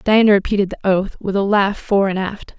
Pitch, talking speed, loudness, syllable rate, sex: 200 Hz, 230 wpm, -17 LUFS, 5.5 syllables/s, female